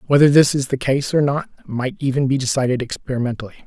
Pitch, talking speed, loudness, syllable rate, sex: 135 Hz, 195 wpm, -19 LUFS, 6.6 syllables/s, male